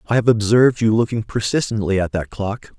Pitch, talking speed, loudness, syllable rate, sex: 110 Hz, 195 wpm, -18 LUFS, 5.7 syllables/s, male